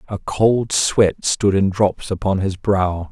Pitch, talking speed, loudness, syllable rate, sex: 100 Hz, 175 wpm, -18 LUFS, 3.5 syllables/s, male